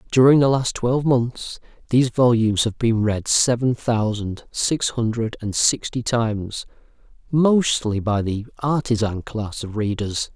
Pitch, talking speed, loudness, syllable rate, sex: 115 Hz, 140 wpm, -20 LUFS, 4.3 syllables/s, male